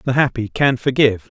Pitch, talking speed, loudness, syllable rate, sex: 125 Hz, 175 wpm, -17 LUFS, 5.5 syllables/s, male